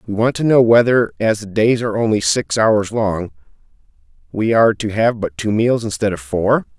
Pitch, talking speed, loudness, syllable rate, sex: 105 Hz, 205 wpm, -16 LUFS, 5.1 syllables/s, male